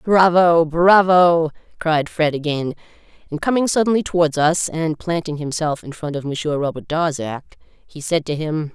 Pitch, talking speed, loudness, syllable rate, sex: 160 Hz, 150 wpm, -18 LUFS, 4.5 syllables/s, female